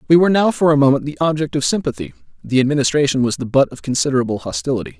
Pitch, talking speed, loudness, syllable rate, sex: 145 Hz, 215 wpm, -17 LUFS, 7.6 syllables/s, male